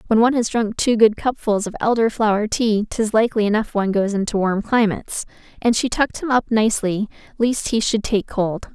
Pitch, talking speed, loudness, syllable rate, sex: 220 Hz, 205 wpm, -19 LUFS, 5.7 syllables/s, female